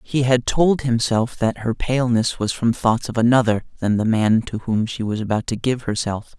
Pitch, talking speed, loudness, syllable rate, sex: 115 Hz, 215 wpm, -20 LUFS, 4.9 syllables/s, male